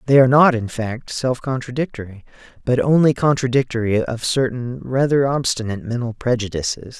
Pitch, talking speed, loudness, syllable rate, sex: 125 Hz, 135 wpm, -19 LUFS, 5.5 syllables/s, male